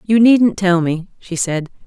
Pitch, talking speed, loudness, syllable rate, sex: 190 Hz, 195 wpm, -15 LUFS, 3.9 syllables/s, female